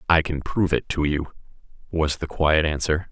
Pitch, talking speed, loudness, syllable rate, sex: 80 Hz, 195 wpm, -23 LUFS, 5.1 syllables/s, male